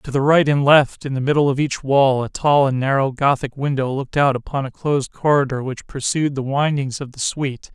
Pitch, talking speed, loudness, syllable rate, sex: 135 Hz, 230 wpm, -19 LUFS, 5.5 syllables/s, male